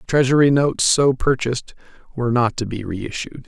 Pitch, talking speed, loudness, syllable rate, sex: 125 Hz, 155 wpm, -19 LUFS, 5.5 syllables/s, male